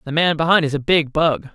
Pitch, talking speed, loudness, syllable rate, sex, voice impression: 150 Hz, 270 wpm, -17 LUFS, 5.7 syllables/s, female, very feminine, adult-like, slightly middle-aged, slightly thin, very tensed, very powerful, very bright, hard, very clear, fluent, cool, very intellectual, refreshing, sincere, calm, slightly reassuring, slightly unique, wild, very lively, strict, intense